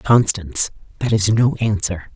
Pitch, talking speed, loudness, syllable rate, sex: 105 Hz, 140 wpm, -18 LUFS, 4.4 syllables/s, female